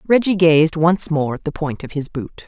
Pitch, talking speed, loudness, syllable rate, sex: 155 Hz, 245 wpm, -18 LUFS, 4.6 syllables/s, female